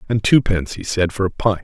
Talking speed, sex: 255 wpm, male